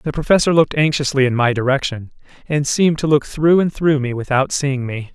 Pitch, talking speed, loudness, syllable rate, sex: 140 Hz, 210 wpm, -17 LUFS, 5.7 syllables/s, male